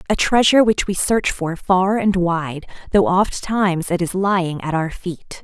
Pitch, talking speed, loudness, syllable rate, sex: 185 Hz, 200 wpm, -18 LUFS, 4.5 syllables/s, female